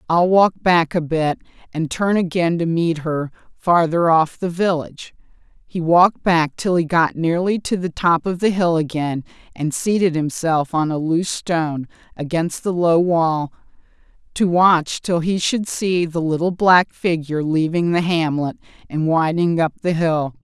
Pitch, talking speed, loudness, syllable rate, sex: 165 Hz, 170 wpm, -18 LUFS, 4.4 syllables/s, female